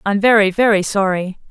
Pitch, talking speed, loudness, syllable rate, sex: 200 Hz, 160 wpm, -15 LUFS, 5.3 syllables/s, female